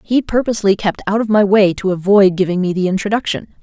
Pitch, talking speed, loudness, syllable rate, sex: 200 Hz, 215 wpm, -15 LUFS, 6.1 syllables/s, female